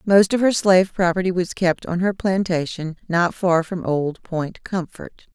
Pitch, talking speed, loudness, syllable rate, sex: 180 Hz, 180 wpm, -20 LUFS, 4.4 syllables/s, female